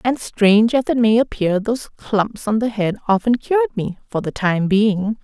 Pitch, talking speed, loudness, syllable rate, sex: 215 Hz, 195 wpm, -18 LUFS, 4.9 syllables/s, female